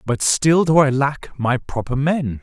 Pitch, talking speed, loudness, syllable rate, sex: 140 Hz, 200 wpm, -18 LUFS, 3.9 syllables/s, male